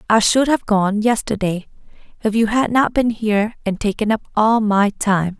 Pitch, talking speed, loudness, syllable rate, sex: 215 Hz, 190 wpm, -17 LUFS, 4.7 syllables/s, female